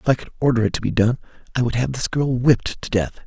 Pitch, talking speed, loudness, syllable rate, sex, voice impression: 125 Hz, 295 wpm, -21 LUFS, 6.8 syllables/s, male, masculine, adult-like, slightly soft, slightly muffled, cool, sincere, calm, slightly sweet, kind